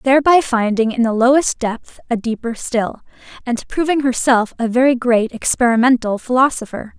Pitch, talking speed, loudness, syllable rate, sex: 245 Hz, 145 wpm, -16 LUFS, 5.0 syllables/s, female